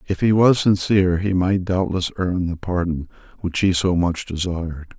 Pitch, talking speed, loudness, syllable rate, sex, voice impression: 90 Hz, 180 wpm, -20 LUFS, 4.7 syllables/s, male, masculine, middle-aged, slightly relaxed, slightly dark, slightly hard, clear, slightly raspy, cool, intellectual, calm, mature, friendly, wild, kind, modest